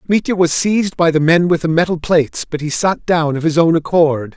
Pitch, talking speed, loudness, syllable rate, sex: 165 Hz, 250 wpm, -15 LUFS, 5.5 syllables/s, male